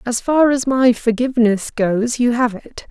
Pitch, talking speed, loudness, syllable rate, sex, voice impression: 240 Hz, 185 wpm, -16 LUFS, 4.3 syllables/s, female, feminine, adult-like, relaxed, bright, soft, fluent, raspy, friendly, reassuring, elegant, lively, kind, slightly light